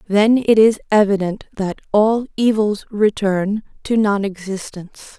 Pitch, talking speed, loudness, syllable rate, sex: 205 Hz, 115 wpm, -17 LUFS, 4.2 syllables/s, female